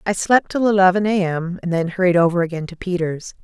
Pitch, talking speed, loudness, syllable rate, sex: 180 Hz, 225 wpm, -18 LUFS, 5.9 syllables/s, female